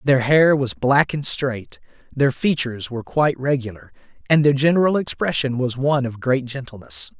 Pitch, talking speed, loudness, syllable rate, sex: 135 Hz, 165 wpm, -19 LUFS, 5.2 syllables/s, male